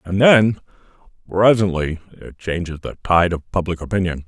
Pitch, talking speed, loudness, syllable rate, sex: 90 Hz, 140 wpm, -18 LUFS, 5.0 syllables/s, male